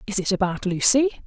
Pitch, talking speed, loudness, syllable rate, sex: 210 Hz, 190 wpm, -20 LUFS, 6.1 syllables/s, female